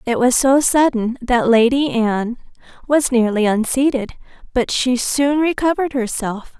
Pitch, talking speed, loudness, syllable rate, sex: 250 Hz, 135 wpm, -17 LUFS, 4.5 syllables/s, female